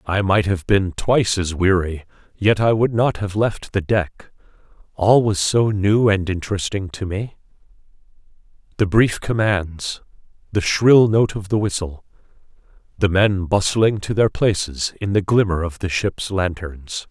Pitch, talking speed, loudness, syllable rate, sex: 100 Hz, 155 wpm, -19 LUFS, 4.3 syllables/s, male